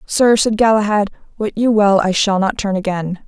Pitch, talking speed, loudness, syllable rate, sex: 205 Hz, 200 wpm, -15 LUFS, 4.9 syllables/s, female